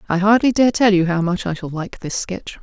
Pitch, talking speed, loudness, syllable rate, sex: 190 Hz, 275 wpm, -18 LUFS, 5.3 syllables/s, female